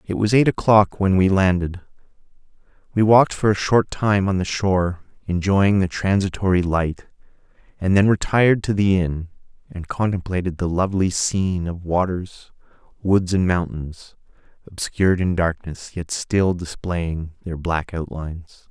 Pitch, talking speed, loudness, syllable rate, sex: 90 Hz, 145 wpm, -20 LUFS, 4.6 syllables/s, male